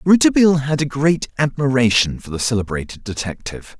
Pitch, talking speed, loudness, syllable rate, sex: 130 Hz, 140 wpm, -18 LUFS, 6.1 syllables/s, male